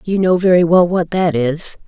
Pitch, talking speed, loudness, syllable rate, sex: 175 Hz, 225 wpm, -14 LUFS, 4.7 syllables/s, female